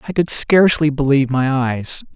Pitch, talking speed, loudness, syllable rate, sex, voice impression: 140 Hz, 165 wpm, -16 LUFS, 5.3 syllables/s, male, masculine, adult-like, tensed, powerful, slightly bright, slightly soft, clear, slightly raspy, cool, intellectual, calm, friendly, slightly wild, lively